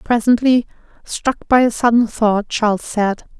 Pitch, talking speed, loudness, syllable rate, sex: 225 Hz, 140 wpm, -16 LUFS, 4.4 syllables/s, female